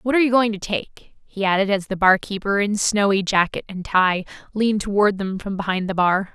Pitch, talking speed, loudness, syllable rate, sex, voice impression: 200 Hz, 215 wpm, -20 LUFS, 5.4 syllables/s, female, feminine, slightly adult-like, clear, slightly cute, slightly sincere, slightly friendly